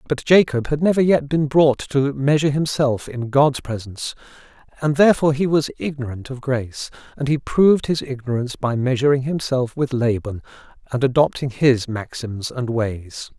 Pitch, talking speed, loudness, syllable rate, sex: 135 Hz, 160 wpm, -19 LUFS, 5.2 syllables/s, male